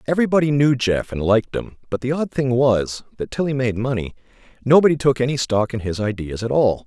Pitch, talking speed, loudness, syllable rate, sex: 125 Hz, 220 wpm, -20 LUFS, 5.9 syllables/s, male